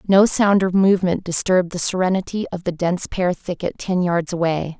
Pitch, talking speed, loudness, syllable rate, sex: 180 Hz, 190 wpm, -19 LUFS, 5.5 syllables/s, female